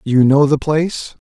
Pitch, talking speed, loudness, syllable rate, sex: 145 Hz, 190 wpm, -14 LUFS, 4.6 syllables/s, male